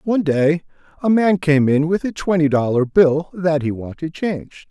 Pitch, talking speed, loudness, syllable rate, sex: 160 Hz, 190 wpm, -18 LUFS, 4.8 syllables/s, male